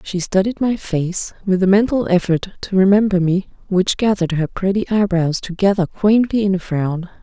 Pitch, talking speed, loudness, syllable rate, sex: 190 Hz, 175 wpm, -17 LUFS, 5.1 syllables/s, female